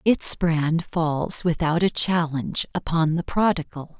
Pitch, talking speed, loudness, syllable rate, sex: 165 Hz, 135 wpm, -22 LUFS, 3.9 syllables/s, female